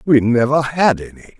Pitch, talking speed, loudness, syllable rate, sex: 130 Hz, 175 wpm, -15 LUFS, 5.4 syllables/s, male